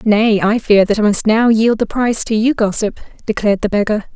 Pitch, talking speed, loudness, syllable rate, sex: 215 Hz, 230 wpm, -14 LUFS, 5.7 syllables/s, female